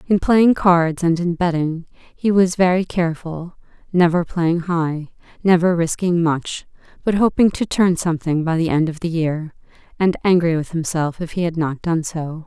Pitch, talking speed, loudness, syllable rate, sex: 170 Hz, 180 wpm, -19 LUFS, 4.6 syllables/s, female